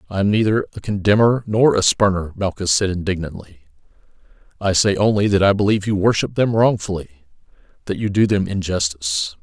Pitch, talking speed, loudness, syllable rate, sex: 95 Hz, 165 wpm, -18 LUFS, 5.9 syllables/s, male